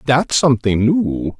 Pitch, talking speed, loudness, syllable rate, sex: 130 Hz, 130 wpm, -16 LUFS, 4.1 syllables/s, male